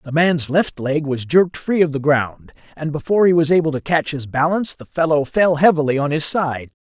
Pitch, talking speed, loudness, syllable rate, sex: 155 Hz, 230 wpm, -18 LUFS, 5.5 syllables/s, male